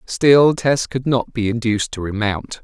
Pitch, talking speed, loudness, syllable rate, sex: 120 Hz, 180 wpm, -18 LUFS, 4.4 syllables/s, male